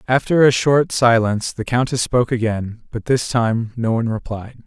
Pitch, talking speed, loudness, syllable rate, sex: 120 Hz, 180 wpm, -18 LUFS, 5.0 syllables/s, male